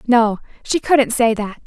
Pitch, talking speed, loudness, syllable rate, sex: 235 Hz, 180 wpm, -17 LUFS, 4.0 syllables/s, female